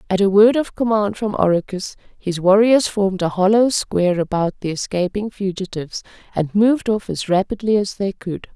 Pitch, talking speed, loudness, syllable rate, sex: 200 Hz, 175 wpm, -18 LUFS, 5.2 syllables/s, female